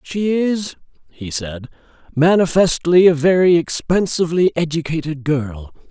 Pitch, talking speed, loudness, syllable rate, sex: 160 Hz, 100 wpm, -16 LUFS, 4.4 syllables/s, male